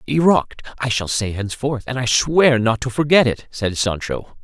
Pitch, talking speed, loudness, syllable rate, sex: 120 Hz, 190 wpm, -18 LUFS, 5.0 syllables/s, male